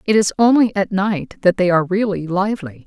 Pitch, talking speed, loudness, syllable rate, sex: 190 Hz, 210 wpm, -17 LUFS, 5.7 syllables/s, female